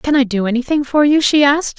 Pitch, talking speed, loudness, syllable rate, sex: 275 Hz, 270 wpm, -14 LUFS, 6.3 syllables/s, female